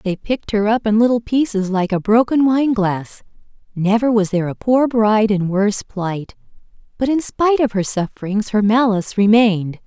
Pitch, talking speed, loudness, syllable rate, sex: 215 Hz, 175 wpm, -17 LUFS, 5.3 syllables/s, female